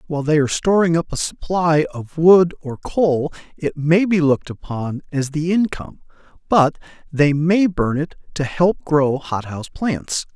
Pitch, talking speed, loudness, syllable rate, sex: 155 Hz, 170 wpm, -18 LUFS, 4.6 syllables/s, male